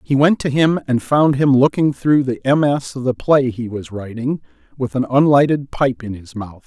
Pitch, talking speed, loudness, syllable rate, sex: 130 Hz, 215 wpm, -17 LUFS, 4.6 syllables/s, male